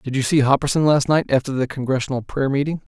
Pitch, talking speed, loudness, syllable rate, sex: 135 Hz, 225 wpm, -19 LUFS, 6.4 syllables/s, male